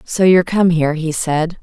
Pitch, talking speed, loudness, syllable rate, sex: 170 Hz, 220 wpm, -15 LUFS, 5.3 syllables/s, female